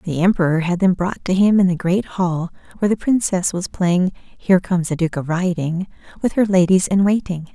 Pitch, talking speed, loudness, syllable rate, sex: 180 Hz, 215 wpm, -18 LUFS, 5.4 syllables/s, female